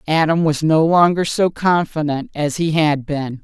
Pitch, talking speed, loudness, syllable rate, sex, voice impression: 155 Hz, 175 wpm, -17 LUFS, 4.3 syllables/s, female, slightly feminine, slightly gender-neutral, adult-like, middle-aged, slightly thick, tensed, powerful, slightly bright, hard, clear, fluent, slightly raspy, slightly cool, slightly intellectual, slightly sincere, calm, slightly mature, friendly, slightly reassuring, unique, very wild, slightly lively, very strict, slightly intense, sharp